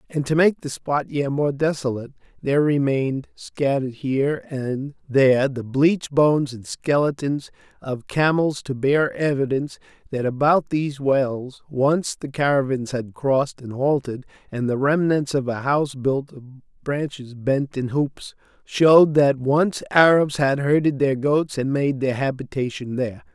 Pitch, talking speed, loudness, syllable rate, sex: 140 Hz, 155 wpm, -21 LUFS, 4.5 syllables/s, male